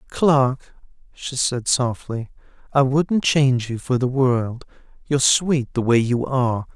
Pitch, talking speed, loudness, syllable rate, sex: 130 Hz, 150 wpm, -20 LUFS, 3.9 syllables/s, male